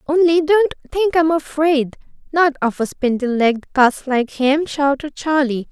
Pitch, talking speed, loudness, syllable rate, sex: 290 Hz, 145 wpm, -17 LUFS, 4.3 syllables/s, female